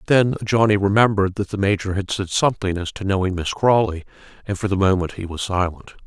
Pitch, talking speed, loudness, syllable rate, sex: 100 Hz, 210 wpm, -20 LUFS, 6.1 syllables/s, male